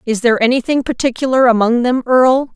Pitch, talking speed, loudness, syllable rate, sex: 245 Hz, 165 wpm, -13 LUFS, 6.3 syllables/s, female